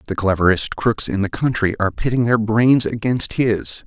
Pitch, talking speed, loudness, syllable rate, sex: 110 Hz, 185 wpm, -18 LUFS, 4.9 syllables/s, male